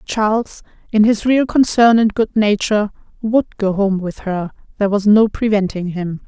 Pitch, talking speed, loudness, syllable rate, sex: 210 Hz, 170 wpm, -16 LUFS, 4.7 syllables/s, female